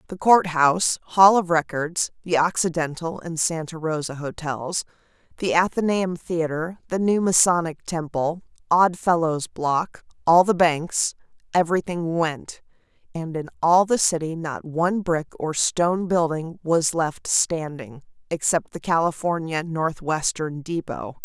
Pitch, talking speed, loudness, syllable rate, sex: 165 Hz, 130 wpm, -22 LUFS, 4.2 syllables/s, female